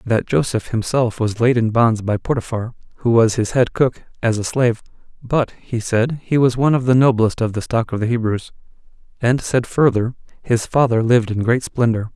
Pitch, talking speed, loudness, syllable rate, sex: 120 Hz, 200 wpm, -18 LUFS, 5.2 syllables/s, male